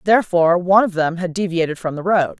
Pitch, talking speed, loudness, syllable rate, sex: 180 Hz, 225 wpm, -17 LUFS, 6.7 syllables/s, female